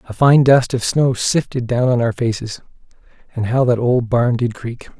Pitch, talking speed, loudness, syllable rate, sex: 125 Hz, 205 wpm, -16 LUFS, 4.8 syllables/s, male